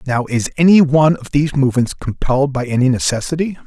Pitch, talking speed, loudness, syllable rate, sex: 140 Hz, 180 wpm, -15 LUFS, 6.6 syllables/s, male